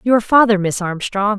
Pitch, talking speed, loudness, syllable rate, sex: 210 Hz, 175 wpm, -15 LUFS, 4.5 syllables/s, female